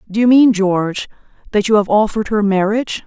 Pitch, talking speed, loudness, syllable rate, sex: 210 Hz, 195 wpm, -14 LUFS, 6.2 syllables/s, female